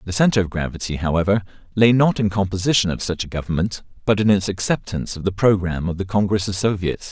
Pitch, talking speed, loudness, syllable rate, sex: 100 Hz, 210 wpm, -20 LUFS, 6.5 syllables/s, male